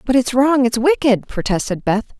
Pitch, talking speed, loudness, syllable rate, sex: 240 Hz, 165 wpm, -17 LUFS, 4.8 syllables/s, female